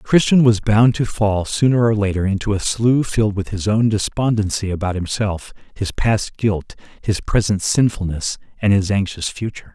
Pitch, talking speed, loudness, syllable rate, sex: 105 Hz, 170 wpm, -18 LUFS, 4.9 syllables/s, male